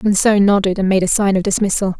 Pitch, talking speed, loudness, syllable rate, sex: 195 Hz, 240 wpm, -15 LUFS, 6.2 syllables/s, female